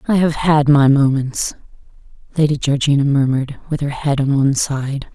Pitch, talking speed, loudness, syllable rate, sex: 140 Hz, 165 wpm, -16 LUFS, 5.2 syllables/s, female